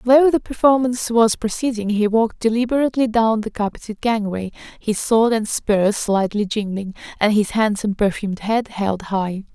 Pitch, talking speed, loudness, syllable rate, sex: 220 Hz, 155 wpm, -19 LUFS, 5.1 syllables/s, female